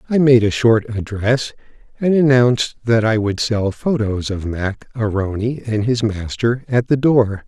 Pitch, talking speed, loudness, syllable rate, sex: 115 Hz, 170 wpm, -17 LUFS, 4.3 syllables/s, male